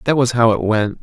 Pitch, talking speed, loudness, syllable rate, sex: 115 Hz, 295 wpm, -16 LUFS, 5.5 syllables/s, male